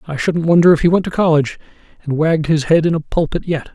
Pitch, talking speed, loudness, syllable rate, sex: 160 Hz, 255 wpm, -15 LUFS, 6.6 syllables/s, male